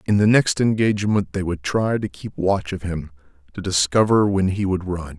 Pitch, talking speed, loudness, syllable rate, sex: 95 Hz, 210 wpm, -20 LUFS, 5.0 syllables/s, male